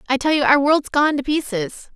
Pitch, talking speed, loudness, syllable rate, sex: 280 Hz, 215 wpm, -18 LUFS, 5.2 syllables/s, female